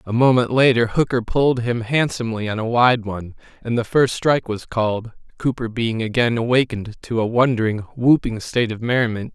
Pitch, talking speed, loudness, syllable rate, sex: 115 Hz, 180 wpm, -19 LUFS, 5.7 syllables/s, male